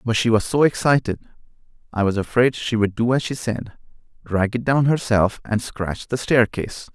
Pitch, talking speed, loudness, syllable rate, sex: 115 Hz, 180 wpm, -20 LUFS, 5.0 syllables/s, male